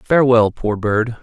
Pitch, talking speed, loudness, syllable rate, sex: 115 Hz, 145 wpm, -16 LUFS, 4.3 syllables/s, male